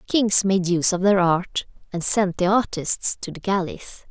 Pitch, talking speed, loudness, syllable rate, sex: 185 Hz, 190 wpm, -21 LUFS, 4.7 syllables/s, female